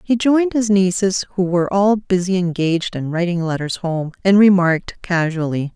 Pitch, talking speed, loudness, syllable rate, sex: 185 Hz, 165 wpm, -17 LUFS, 5.4 syllables/s, female